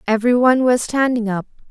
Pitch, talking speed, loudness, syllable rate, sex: 235 Hz, 140 wpm, -17 LUFS, 5.9 syllables/s, female